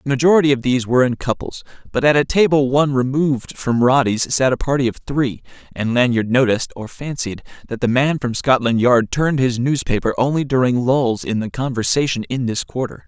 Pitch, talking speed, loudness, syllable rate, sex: 130 Hz, 195 wpm, -18 LUFS, 5.7 syllables/s, male